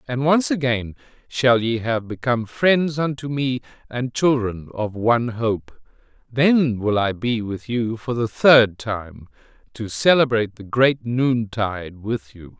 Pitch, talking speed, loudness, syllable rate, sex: 120 Hz, 150 wpm, -20 LUFS, 4.0 syllables/s, male